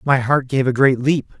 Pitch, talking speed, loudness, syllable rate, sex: 130 Hz, 255 wpm, -17 LUFS, 4.8 syllables/s, male